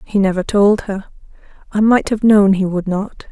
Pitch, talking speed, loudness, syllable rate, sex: 200 Hz, 200 wpm, -15 LUFS, 4.6 syllables/s, female